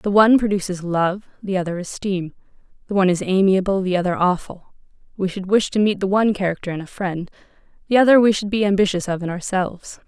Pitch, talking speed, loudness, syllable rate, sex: 190 Hz, 200 wpm, -19 LUFS, 6.3 syllables/s, female